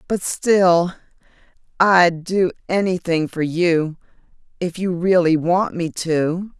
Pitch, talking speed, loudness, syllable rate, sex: 175 Hz, 100 wpm, -18 LUFS, 3.4 syllables/s, female